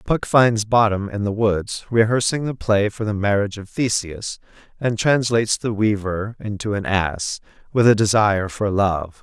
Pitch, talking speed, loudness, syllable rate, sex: 105 Hz, 170 wpm, -20 LUFS, 4.6 syllables/s, male